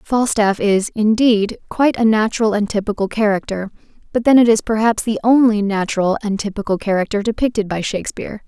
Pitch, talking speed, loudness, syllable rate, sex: 215 Hz, 165 wpm, -17 LUFS, 5.8 syllables/s, female